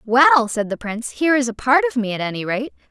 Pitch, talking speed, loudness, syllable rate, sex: 250 Hz, 270 wpm, -19 LUFS, 6.3 syllables/s, female